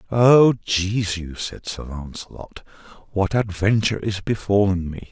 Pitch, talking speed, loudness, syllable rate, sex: 100 Hz, 115 wpm, -20 LUFS, 4.1 syllables/s, male